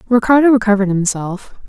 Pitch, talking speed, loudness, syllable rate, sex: 215 Hz, 105 wpm, -13 LUFS, 6.0 syllables/s, female